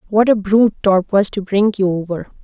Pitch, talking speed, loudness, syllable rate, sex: 200 Hz, 220 wpm, -16 LUFS, 5.6 syllables/s, female